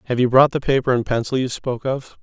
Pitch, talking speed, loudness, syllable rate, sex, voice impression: 130 Hz, 270 wpm, -19 LUFS, 6.5 syllables/s, male, masculine, adult-like, tensed, powerful, slightly bright, soft, raspy, cool, calm, friendly, wild, kind